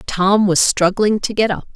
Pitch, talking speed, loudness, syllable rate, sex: 200 Hz, 205 wpm, -15 LUFS, 4.5 syllables/s, female